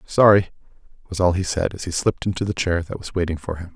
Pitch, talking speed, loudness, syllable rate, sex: 90 Hz, 255 wpm, -21 LUFS, 6.6 syllables/s, male